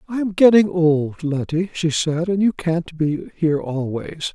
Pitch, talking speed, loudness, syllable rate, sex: 165 Hz, 180 wpm, -19 LUFS, 4.2 syllables/s, male